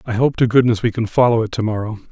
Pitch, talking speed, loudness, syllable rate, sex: 115 Hz, 285 wpm, -17 LUFS, 6.8 syllables/s, male